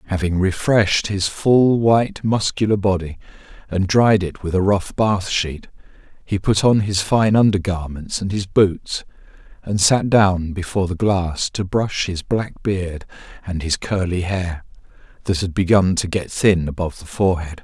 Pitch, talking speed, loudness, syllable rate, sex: 95 Hz, 165 wpm, -19 LUFS, 4.5 syllables/s, male